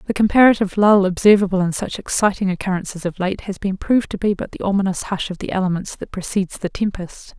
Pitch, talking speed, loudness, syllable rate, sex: 190 Hz, 210 wpm, -19 LUFS, 6.4 syllables/s, female